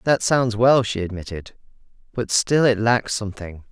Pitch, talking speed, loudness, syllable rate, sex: 110 Hz, 160 wpm, -20 LUFS, 4.7 syllables/s, male